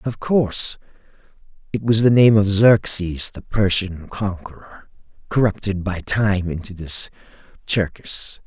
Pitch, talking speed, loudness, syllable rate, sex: 100 Hz, 105 wpm, -19 LUFS, 4.1 syllables/s, male